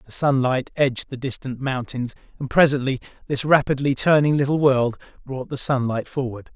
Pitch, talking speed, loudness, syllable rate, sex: 130 Hz, 155 wpm, -21 LUFS, 5.2 syllables/s, male